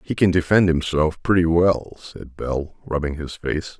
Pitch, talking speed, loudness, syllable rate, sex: 85 Hz, 175 wpm, -21 LUFS, 4.4 syllables/s, male